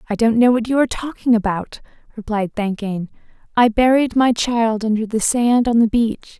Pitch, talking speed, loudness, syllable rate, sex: 230 Hz, 190 wpm, -17 LUFS, 5.2 syllables/s, female